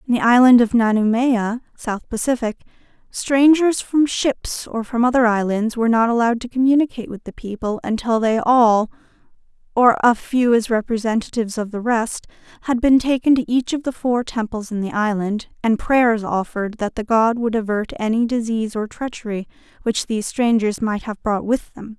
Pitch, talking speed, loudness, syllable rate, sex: 230 Hz, 175 wpm, -19 LUFS, 5.2 syllables/s, female